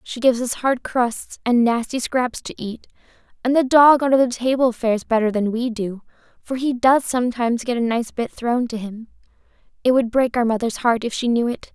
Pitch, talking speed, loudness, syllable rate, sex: 240 Hz, 215 wpm, -20 LUFS, 5.2 syllables/s, female